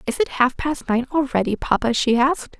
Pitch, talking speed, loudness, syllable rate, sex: 265 Hz, 210 wpm, -20 LUFS, 5.4 syllables/s, female